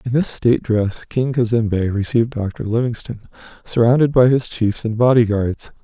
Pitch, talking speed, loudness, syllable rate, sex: 115 Hz, 165 wpm, -18 LUFS, 5.2 syllables/s, male